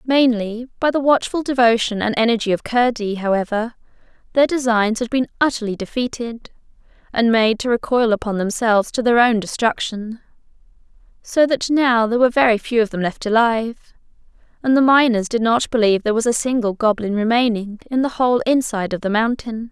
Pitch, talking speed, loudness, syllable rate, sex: 230 Hz, 170 wpm, -18 LUFS, 5.6 syllables/s, female